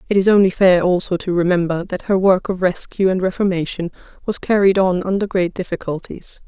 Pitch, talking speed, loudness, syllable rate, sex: 185 Hz, 185 wpm, -17 LUFS, 5.6 syllables/s, female